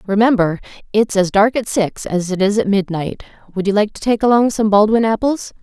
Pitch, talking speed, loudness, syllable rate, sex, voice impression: 205 Hz, 215 wpm, -16 LUFS, 5.4 syllables/s, female, very feminine, slightly adult-like, fluent, slightly intellectual, slightly elegant, slightly lively